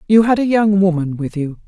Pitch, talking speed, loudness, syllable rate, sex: 185 Hz, 250 wpm, -16 LUFS, 5.5 syllables/s, female